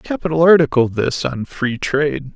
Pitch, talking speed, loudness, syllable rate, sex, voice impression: 140 Hz, 155 wpm, -17 LUFS, 4.8 syllables/s, male, very masculine, old, very thick, slightly tensed, very powerful, bright, soft, muffled, slightly fluent, very raspy, slightly cool, intellectual, slightly refreshing, sincere, very calm, very mature, slightly friendly, reassuring, very unique, slightly elegant, very wild, sweet, lively, kind, slightly modest